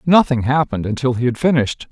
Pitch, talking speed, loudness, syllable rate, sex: 130 Hz, 190 wpm, -17 LUFS, 6.7 syllables/s, male